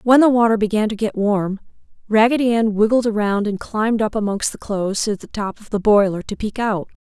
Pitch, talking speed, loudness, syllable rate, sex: 215 Hz, 220 wpm, -18 LUFS, 5.7 syllables/s, female